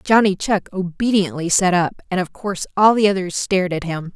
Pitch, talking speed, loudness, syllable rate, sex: 190 Hz, 200 wpm, -18 LUFS, 5.5 syllables/s, female